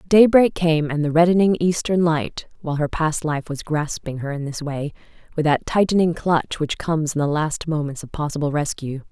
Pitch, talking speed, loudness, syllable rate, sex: 155 Hz, 205 wpm, -20 LUFS, 5.2 syllables/s, female